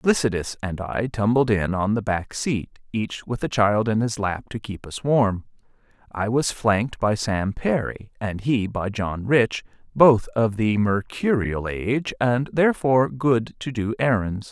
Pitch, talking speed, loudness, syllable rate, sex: 115 Hz, 175 wpm, -23 LUFS, 4.1 syllables/s, male